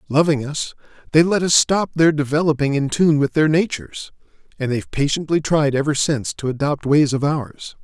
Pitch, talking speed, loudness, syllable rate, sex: 150 Hz, 185 wpm, -18 LUFS, 5.4 syllables/s, male